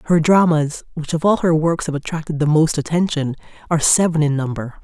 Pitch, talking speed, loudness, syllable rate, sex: 160 Hz, 200 wpm, -18 LUFS, 5.8 syllables/s, female